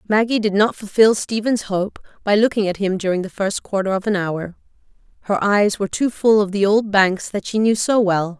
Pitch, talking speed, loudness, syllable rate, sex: 205 Hz, 220 wpm, -18 LUFS, 5.2 syllables/s, female